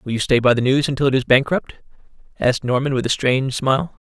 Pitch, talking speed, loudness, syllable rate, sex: 130 Hz, 235 wpm, -18 LUFS, 6.5 syllables/s, male